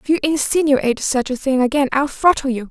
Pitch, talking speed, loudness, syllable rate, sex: 275 Hz, 220 wpm, -17 LUFS, 6.0 syllables/s, female